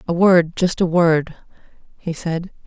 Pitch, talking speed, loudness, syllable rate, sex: 170 Hz, 135 wpm, -18 LUFS, 3.8 syllables/s, female